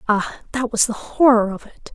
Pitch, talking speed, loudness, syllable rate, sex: 230 Hz, 215 wpm, -19 LUFS, 5.1 syllables/s, female